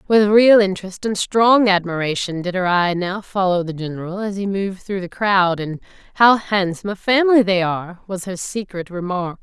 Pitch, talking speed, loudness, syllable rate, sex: 190 Hz, 190 wpm, -18 LUFS, 5.2 syllables/s, female